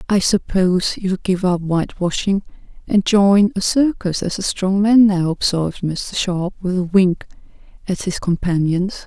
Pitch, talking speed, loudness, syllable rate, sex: 190 Hz, 160 wpm, -18 LUFS, 4.5 syllables/s, female